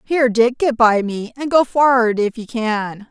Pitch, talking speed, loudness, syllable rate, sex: 235 Hz, 210 wpm, -17 LUFS, 4.4 syllables/s, female